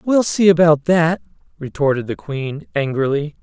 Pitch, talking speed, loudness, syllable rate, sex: 150 Hz, 140 wpm, -17 LUFS, 4.6 syllables/s, male